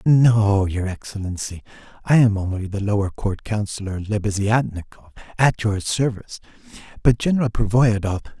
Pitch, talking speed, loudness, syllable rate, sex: 105 Hz, 120 wpm, -21 LUFS, 5.2 syllables/s, male